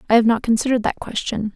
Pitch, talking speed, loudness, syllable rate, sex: 225 Hz, 230 wpm, -19 LUFS, 7.4 syllables/s, female